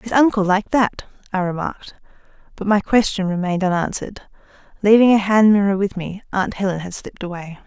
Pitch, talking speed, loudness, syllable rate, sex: 200 Hz, 170 wpm, -18 LUFS, 5.9 syllables/s, female